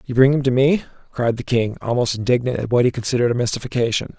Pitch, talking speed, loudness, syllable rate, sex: 125 Hz, 230 wpm, -19 LUFS, 7.0 syllables/s, male